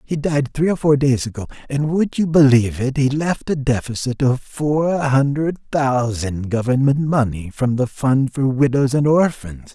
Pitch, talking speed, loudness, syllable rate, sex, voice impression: 135 Hz, 180 wpm, -18 LUFS, 4.4 syllables/s, male, very masculine, very adult-like, very old, thick, slightly relaxed, weak, slightly bright, slightly soft, very muffled, slightly fluent, very raspy, cool, intellectual, sincere, calm, very mature, friendly, slightly reassuring, very unique, slightly elegant, wild, lively, strict, intense, slightly sharp